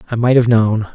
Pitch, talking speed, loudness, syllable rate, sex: 115 Hz, 255 wpm, -14 LUFS, 5.9 syllables/s, male